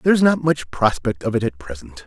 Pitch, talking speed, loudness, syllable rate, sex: 125 Hz, 260 wpm, -19 LUFS, 5.9 syllables/s, male